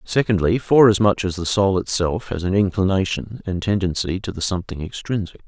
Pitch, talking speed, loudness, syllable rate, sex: 95 Hz, 165 wpm, -20 LUFS, 5.5 syllables/s, male